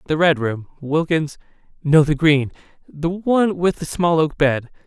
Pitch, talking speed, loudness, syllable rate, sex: 155 Hz, 150 wpm, -18 LUFS, 4.4 syllables/s, male